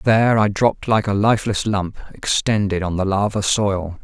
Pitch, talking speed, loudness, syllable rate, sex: 100 Hz, 180 wpm, -19 LUFS, 5.1 syllables/s, male